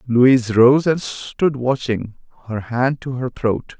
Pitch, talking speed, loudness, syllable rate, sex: 125 Hz, 160 wpm, -18 LUFS, 3.6 syllables/s, male